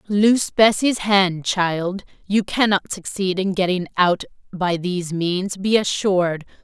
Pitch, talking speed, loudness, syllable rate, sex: 190 Hz, 135 wpm, -20 LUFS, 4.0 syllables/s, female